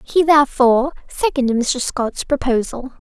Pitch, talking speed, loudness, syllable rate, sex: 265 Hz, 115 wpm, -17 LUFS, 4.7 syllables/s, female